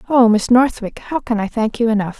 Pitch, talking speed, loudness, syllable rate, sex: 230 Hz, 245 wpm, -16 LUFS, 5.7 syllables/s, female